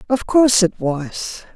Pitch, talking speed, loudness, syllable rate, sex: 215 Hz, 155 wpm, -17 LUFS, 5.3 syllables/s, female